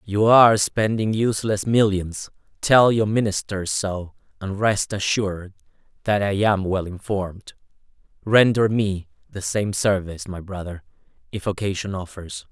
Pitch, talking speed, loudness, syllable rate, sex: 100 Hz, 130 wpm, -21 LUFS, 4.5 syllables/s, male